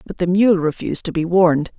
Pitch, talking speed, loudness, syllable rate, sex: 175 Hz, 235 wpm, -17 LUFS, 6.3 syllables/s, female